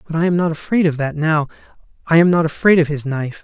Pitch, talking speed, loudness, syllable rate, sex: 160 Hz, 260 wpm, -16 LUFS, 6.7 syllables/s, male